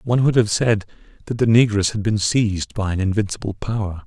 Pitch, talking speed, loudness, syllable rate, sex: 105 Hz, 205 wpm, -19 LUFS, 5.9 syllables/s, male